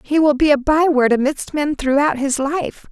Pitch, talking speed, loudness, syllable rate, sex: 285 Hz, 225 wpm, -17 LUFS, 4.7 syllables/s, female